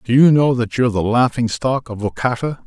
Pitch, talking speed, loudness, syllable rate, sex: 120 Hz, 225 wpm, -17 LUFS, 5.6 syllables/s, male